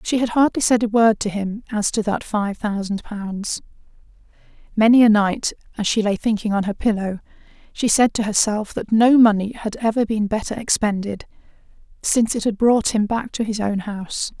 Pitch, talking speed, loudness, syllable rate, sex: 215 Hz, 190 wpm, -19 LUFS, 5.1 syllables/s, female